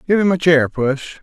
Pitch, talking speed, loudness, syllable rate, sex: 160 Hz, 245 wpm, -16 LUFS, 5.7 syllables/s, male